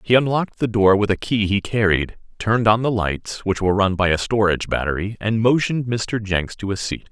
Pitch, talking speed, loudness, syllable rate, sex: 105 Hz, 230 wpm, -20 LUFS, 5.6 syllables/s, male